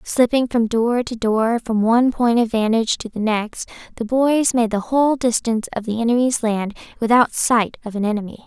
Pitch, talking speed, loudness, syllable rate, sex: 230 Hz, 200 wpm, -19 LUFS, 5.3 syllables/s, female